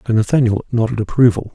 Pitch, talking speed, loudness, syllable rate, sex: 115 Hz, 155 wpm, -16 LUFS, 6.7 syllables/s, male